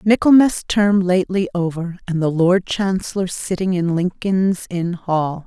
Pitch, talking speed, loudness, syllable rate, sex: 185 Hz, 145 wpm, -18 LUFS, 4.2 syllables/s, female